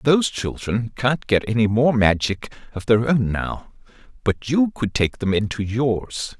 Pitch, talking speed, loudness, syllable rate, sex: 115 Hz, 170 wpm, -21 LUFS, 4.1 syllables/s, male